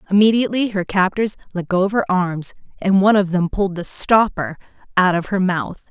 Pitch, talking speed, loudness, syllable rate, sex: 190 Hz, 195 wpm, -18 LUFS, 5.6 syllables/s, female